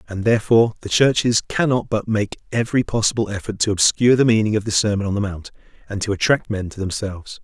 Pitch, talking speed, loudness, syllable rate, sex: 110 Hz, 210 wpm, -19 LUFS, 6.5 syllables/s, male